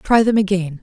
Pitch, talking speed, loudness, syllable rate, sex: 195 Hz, 220 wpm, -16 LUFS, 5.1 syllables/s, female